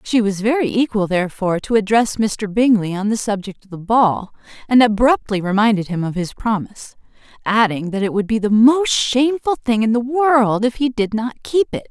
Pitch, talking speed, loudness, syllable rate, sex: 220 Hz, 200 wpm, -17 LUFS, 5.3 syllables/s, female